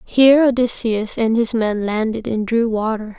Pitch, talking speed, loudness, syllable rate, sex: 225 Hz, 170 wpm, -17 LUFS, 4.6 syllables/s, female